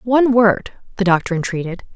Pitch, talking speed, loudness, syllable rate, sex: 205 Hz, 155 wpm, -17 LUFS, 5.6 syllables/s, female